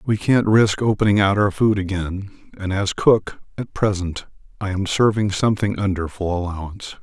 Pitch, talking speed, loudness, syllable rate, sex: 100 Hz, 170 wpm, -20 LUFS, 5.1 syllables/s, male